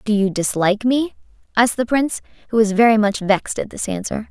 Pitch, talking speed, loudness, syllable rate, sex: 220 Hz, 210 wpm, -18 LUFS, 6.3 syllables/s, female